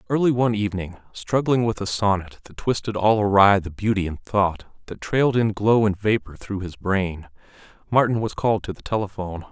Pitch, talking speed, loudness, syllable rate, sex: 100 Hz, 190 wpm, -22 LUFS, 5.5 syllables/s, male